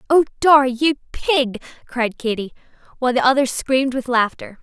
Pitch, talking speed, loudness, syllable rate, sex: 260 Hz, 155 wpm, -18 LUFS, 5.3 syllables/s, female